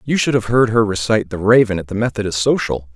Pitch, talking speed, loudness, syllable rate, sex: 105 Hz, 245 wpm, -16 LUFS, 6.4 syllables/s, male